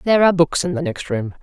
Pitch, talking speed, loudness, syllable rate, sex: 165 Hz, 295 wpm, -18 LUFS, 7.3 syllables/s, female